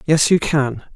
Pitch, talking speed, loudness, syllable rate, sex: 150 Hz, 190 wpm, -17 LUFS, 4.2 syllables/s, male